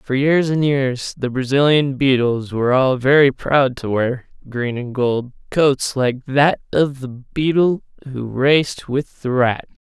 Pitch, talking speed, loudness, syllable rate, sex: 135 Hz, 165 wpm, -18 LUFS, 3.8 syllables/s, male